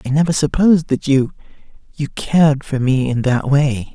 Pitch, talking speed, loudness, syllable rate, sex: 140 Hz, 165 wpm, -16 LUFS, 5.0 syllables/s, male